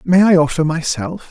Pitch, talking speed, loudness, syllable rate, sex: 165 Hz, 185 wpm, -15 LUFS, 5.0 syllables/s, male